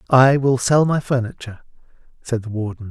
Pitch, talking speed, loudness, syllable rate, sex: 125 Hz, 165 wpm, -18 LUFS, 5.6 syllables/s, male